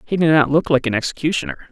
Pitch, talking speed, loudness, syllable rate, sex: 150 Hz, 245 wpm, -18 LUFS, 7.5 syllables/s, male